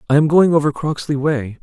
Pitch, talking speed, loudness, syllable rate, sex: 145 Hz, 220 wpm, -16 LUFS, 5.6 syllables/s, male